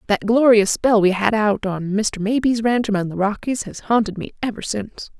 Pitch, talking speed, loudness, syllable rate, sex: 215 Hz, 210 wpm, -19 LUFS, 5.1 syllables/s, female